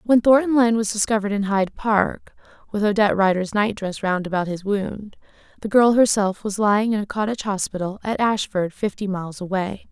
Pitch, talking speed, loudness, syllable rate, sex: 205 Hz, 190 wpm, -21 LUFS, 5.7 syllables/s, female